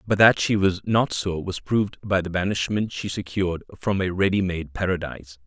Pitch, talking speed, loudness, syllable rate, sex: 95 Hz, 200 wpm, -23 LUFS, 5.4 syllables/s, male